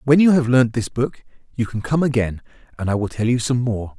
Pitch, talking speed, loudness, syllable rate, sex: 120 Hz, 255 wpm, -20 LUFS, 5.6 syllables/s, male